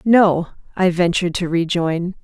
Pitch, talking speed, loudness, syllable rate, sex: 175 Hz, 135 wpm, -18 LUFS, 4.4 syllables/s, female